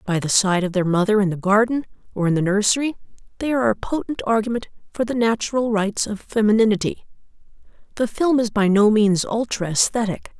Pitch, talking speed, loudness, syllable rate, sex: 215 Hz, 185 wpm, -20 LUFS, 5.9 syllables/s, female